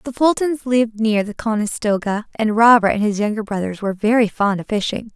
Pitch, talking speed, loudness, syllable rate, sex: 220 Hz, 200 wpm, -18 LUFS, 5.7 syllables/s, female